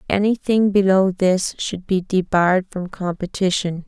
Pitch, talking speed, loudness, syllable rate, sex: 185 Hz, 125 wpm, -19 LUFS, 4.4 syllables/s, female